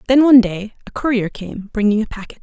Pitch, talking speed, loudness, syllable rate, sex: 225 Hz, 220 wpm, -16 LUFS, 6.3 syllables/s, female